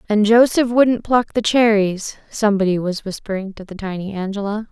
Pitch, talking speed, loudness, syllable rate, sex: 210 Hz, 165 wpm, -18 LUFS, 5.2 syllables/s, female